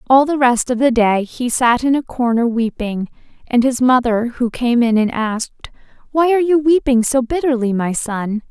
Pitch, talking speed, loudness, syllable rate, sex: 245 Hz, 190 wpm, -16 LUFS, 4.6 syllables/s, female